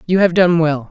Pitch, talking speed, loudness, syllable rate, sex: 170 Hz, 265 wpm, -14 LUFS, 5.3 syllables/s, female